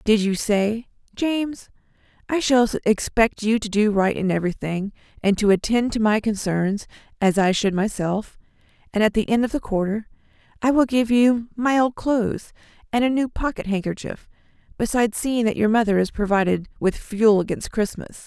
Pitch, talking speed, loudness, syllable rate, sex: 220 Hz, 175 wpm, -21 LUFS, 5.1 syllables/s, female